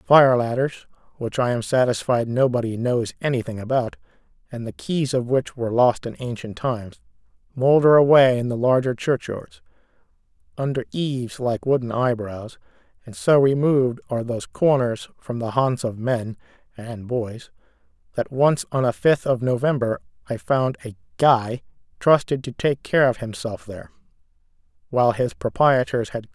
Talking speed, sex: 155 wpm, male